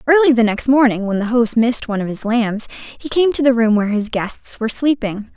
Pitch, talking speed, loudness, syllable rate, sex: 235 Hz, 245 wpm, -17 LUFS, 6.1 syllables/s, female